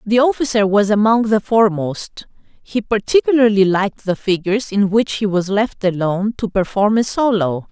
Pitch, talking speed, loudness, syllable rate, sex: 210 Hz, 165 wpm, -16 LUFS, 5.1 syllables/s, female